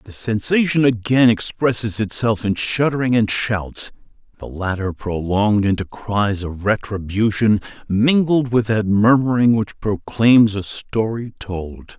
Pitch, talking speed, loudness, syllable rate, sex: 110 Hz, 115 wpm, -18 LUFS, 4.1 syllables/s, male